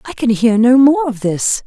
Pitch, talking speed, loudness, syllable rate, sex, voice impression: 240 Hz, 250 wpm, -13 LUFS, 4.5 syllables/s, female, gender-neutral, adult-like